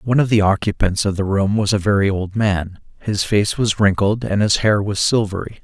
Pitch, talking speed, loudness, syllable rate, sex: 100 Hz, 225 wpm, -18 LUFS, 5.2 syllables/s, male